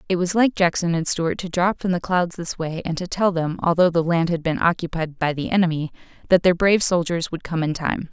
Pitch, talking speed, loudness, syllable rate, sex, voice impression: 170 Hz, 250 wpm, -21 LUFS, 5.6 syllables/s, female, feminine, adult-like, tensed, powerful, slightly hard, clear, fluent, slightly raspy, intellectual, calm, friendly, elegant, lively, slightly sharp